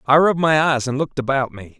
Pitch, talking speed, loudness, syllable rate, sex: 140 Hz, 265 wpm, -18 LUFS, 6.7 syllables/s, male